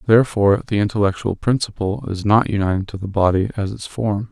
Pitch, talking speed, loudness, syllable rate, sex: 105 Hz, 180 wpm, -19 LUFS, 5.9 syllables/s, male